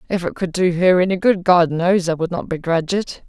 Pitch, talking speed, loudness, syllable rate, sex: 175 Hz, 255 wpm, -18 LUFS, 5.5 syllables/s, female